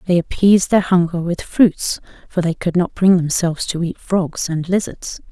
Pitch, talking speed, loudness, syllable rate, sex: 175 Hz, 190 wpm, -17 LUFS, 4.8 syllables/s, female